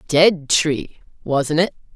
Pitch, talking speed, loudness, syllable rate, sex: 155 Hz, 125 wpm, -18 LUFS, 2.8 syllables/s, female